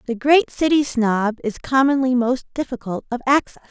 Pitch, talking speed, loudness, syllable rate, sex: 255 Hz, 160 wpm, -19 LUFS, 5.1 syllables/s, female